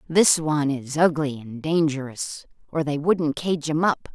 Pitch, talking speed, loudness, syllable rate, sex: 150 Hz, 175 wpm, -23 LUFS, 4.3 syllables/s, female